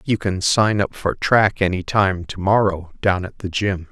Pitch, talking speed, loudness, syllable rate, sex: 95 Hz, 215 wpm, -19 LUFS, 4.3 syllables/s, male